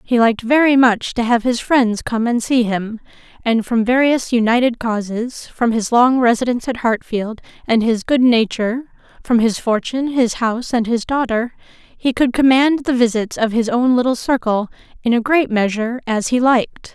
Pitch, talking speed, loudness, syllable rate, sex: 240 Hz, 185 wpm, -16 LUFS, 5.0 syllables/s, female